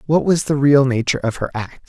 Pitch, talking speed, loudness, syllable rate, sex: 140 Hz, 255 wpm, -17 LUFS, 6.0 syllables/s, male